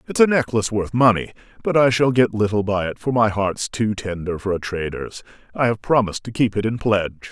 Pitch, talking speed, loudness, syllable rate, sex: 110 Hz, 230 wpm, -20 LUFS, 5.9 syllables/s, male